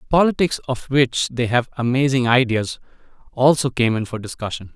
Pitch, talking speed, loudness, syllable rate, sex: 125 Hz, 150 wpm, -19 LUFS, 5.2 syllables/s, male